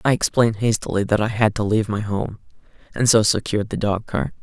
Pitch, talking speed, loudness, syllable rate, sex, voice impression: 105 Hz, 215 wpm, -20 LUFS, 6.1 syllables/s, male, masculine, slightly gender-neutral, young, slightly adult-like, very relaxed, very weak, dark, soft, slightly muffled, fluent, cool, slightly intellectual, very refreshing, sincere, very calm, mature, friendly, reassuring, slightly elegant, sweet, very kind, very modest